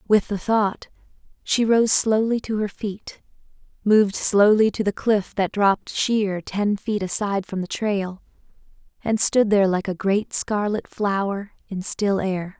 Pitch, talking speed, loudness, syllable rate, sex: 205 Hz, 160 wpm, -21 LUFS, 4.1 syllables/s, female